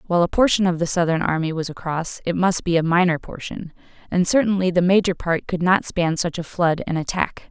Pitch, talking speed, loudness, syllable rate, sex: 175 Hz, 225 wpm, -20 LUFS, 5.7 syllables/s, female